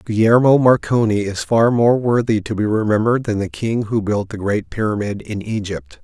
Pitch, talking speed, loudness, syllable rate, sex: 110 Hz, 190 wpm, -17 LUFS, 5.0 syllables/s, male